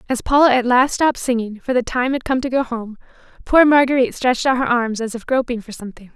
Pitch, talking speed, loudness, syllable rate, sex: 245 Hz, 245 wpm, -17 LUFS, 6.4 syllables/s, female